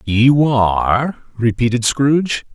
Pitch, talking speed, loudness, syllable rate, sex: 125 Hz, 95 wpm, -15 LUFS, 3.7 syllables/s, male